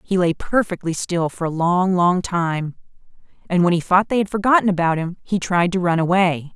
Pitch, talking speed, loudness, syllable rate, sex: 180 Hz, 210 wpm, -19 LUFS, 5.1 syllables/s, female